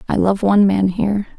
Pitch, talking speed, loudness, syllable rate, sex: 195 Hz, 215 wpm, -16 LUFS, 6.3 syllables/s, female